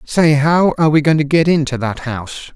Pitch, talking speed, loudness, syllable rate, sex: 145 Hz, 235 wpm, -14 LUFS, 5.5 syllables/s, male